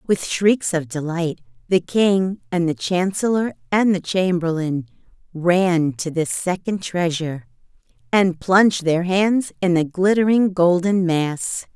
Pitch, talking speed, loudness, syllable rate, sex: 180 Hz, 135 wpm, -19 LUFS, 3.8 syllables/s, female